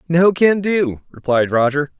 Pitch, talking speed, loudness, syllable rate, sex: 155 Hz, 150 wpm, -16 LUFS, 4.1 syllables/s, male